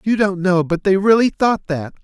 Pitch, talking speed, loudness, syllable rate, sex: 190 Hz, 235 wpm, -16 LUFS, 4.8 syllables/s, male